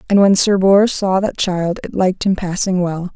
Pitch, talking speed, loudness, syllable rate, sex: 190 Hz, 230 wpm, -15 LUFS, 4.8 syllables/s, female